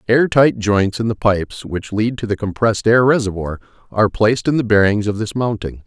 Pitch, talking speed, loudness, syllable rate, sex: 110 Hz, 215 wpm, -17 LUFS, 5.6 syllables/s, male